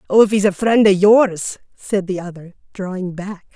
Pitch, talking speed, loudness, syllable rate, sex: 195 Hz, 205 wpm, -16 LUFS, 4.8 syllables/s, female